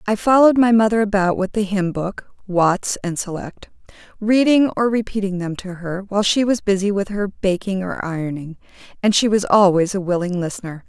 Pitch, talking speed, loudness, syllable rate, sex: 195 Hz, 190 wpm, -18 LUFS, 5.3 syllables/s, female